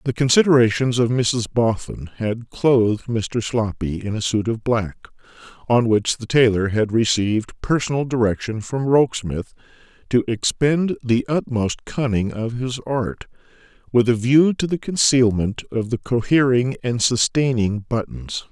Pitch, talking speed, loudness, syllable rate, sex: 120 Hz, 145 wpm, -20 LUFS, 4.4 syllables/s, male